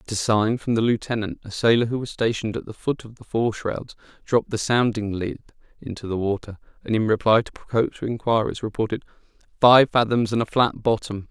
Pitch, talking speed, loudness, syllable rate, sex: 110 Hz, 195 wpm, -22 LUFS, 5.8 syllables/s, male